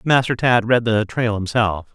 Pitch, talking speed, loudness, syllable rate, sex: 115 Hz, 185 wpm, -18 LUFS, 4.5 syllables/s, male